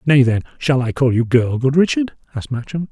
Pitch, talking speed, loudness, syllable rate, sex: 130 Hz, 225 wpm, -17 LUFS, 5.8 syllables/s, male